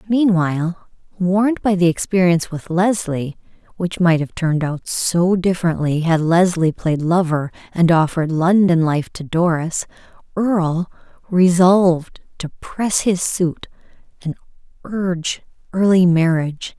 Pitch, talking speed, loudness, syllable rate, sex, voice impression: 175 Hz, 120 wpm, -17 LUFS, 4.3 syllables/s, female, feminine, adult-like, tensed, bright, clear, fluent, intellectual, friendly, elegant, lively, sharp